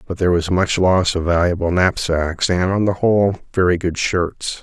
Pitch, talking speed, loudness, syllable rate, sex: 90 Hz, 195 wpm, -17 LUFS, 4.9 syllables/s, male